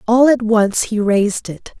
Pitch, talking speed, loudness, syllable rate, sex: 220 Hz, 200 wpm, -15 LUFS, 4.4 syllables/s, female